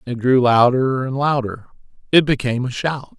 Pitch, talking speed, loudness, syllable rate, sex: 130 Hz, 150 wpm, -17 LUFS, 4.9 syllables/s, male